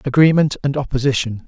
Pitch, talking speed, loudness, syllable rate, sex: 135 Hz, 120 wpm, -17 LUFS, 6.1 syllables/s, male